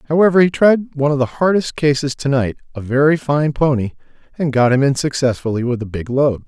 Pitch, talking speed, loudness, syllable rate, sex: 140 Hz, 215 wpm, -16 LUFS, 5.9 syllables/s, male